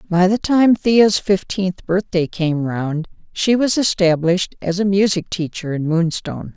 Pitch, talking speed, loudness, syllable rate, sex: 185 Hz, 155 wpm, -18 LUFS, 4.3 syllables/s, female